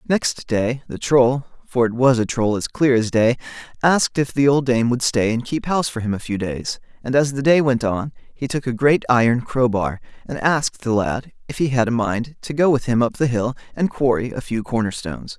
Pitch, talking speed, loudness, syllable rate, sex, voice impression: 125 Hz, 235 wpm, -20 LUFS, 5.2 syllables/s, male, masculine, adult-like, thick, tensed, powerful, clear, slightly nasal, intellectual, friendly, slightly wild, lively